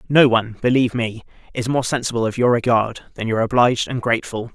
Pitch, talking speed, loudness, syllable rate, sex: 120 Hz, 200 wpm, -19 LUFS, 6.3 syllables/s, male